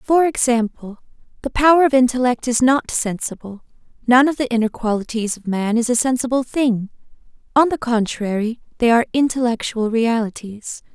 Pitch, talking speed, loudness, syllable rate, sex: 240 Hz, 150 wpm, -18 LUFS, 5.2 syllables/s, female